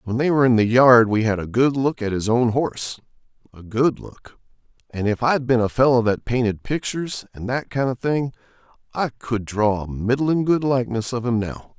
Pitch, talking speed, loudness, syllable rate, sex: 120 Hz, 205 wpm, -20 LUFS, 5.2 syllables/s, male